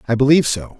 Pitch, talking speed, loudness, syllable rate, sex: 130 Hz, 225 wpm, -15 LUFS, 7.9 syllables/s, male